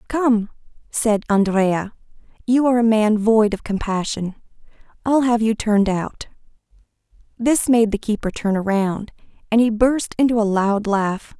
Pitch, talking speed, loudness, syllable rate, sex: 220 Hz, 145 wpm, -19 LUFS, 4.5 syllables/s, female